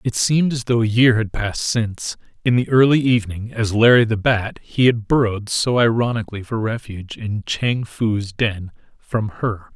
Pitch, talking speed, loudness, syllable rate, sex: 110 Hz, 180 wpm, -19 LUFS, 5.0 syllables/s, male